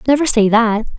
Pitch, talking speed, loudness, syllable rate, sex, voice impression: 235 Hz, 185 wpm, -14 LUFS, 5.3 syllables/s, female, feminine, adult-like, slightly relaxed, soft, intellectual, slightly calm, friendly, slightly reassuring, lively, kind, slightly modest